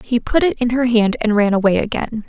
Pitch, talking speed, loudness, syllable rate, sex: 230 Hz, 265 wpm, -17 LUFS, 5.5 syllables/s, female